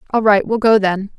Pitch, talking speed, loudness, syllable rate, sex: 210 Hz, 255 wpm, -15 LUFS, 5.8 syllables/s, female